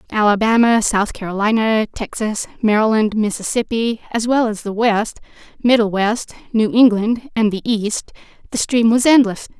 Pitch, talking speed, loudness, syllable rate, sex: 220 Hz, 140 wpm, -17 LUFS, 4.7 syllables/s, female